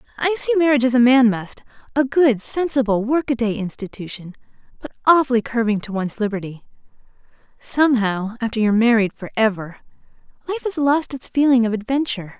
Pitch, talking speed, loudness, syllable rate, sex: 240 Hz, 145 wpm, -19 LUFS, 6.0 syllables/s, female